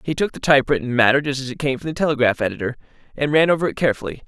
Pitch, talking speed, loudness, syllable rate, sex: 135 Hz, 265 wpm, -19 LUFS, 8.0 syllables/s, male